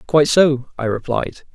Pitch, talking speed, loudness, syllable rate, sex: 135 Hz, 155 wpm, -17 LUFS, 4.9 syllables/s, male